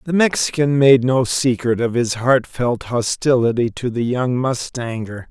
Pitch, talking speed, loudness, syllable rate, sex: 125 Hz, 145 wpm, -18 LUFS, 4.3 syllables/s, male